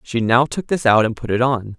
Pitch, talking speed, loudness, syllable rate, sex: 120 Hz, 305 wpm, -17 LUFS, 5.3 syllables/s, male